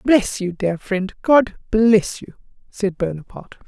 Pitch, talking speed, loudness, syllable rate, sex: 200 Hz, 145 wpm, -19 LUFS, 4.0 syllables/s, female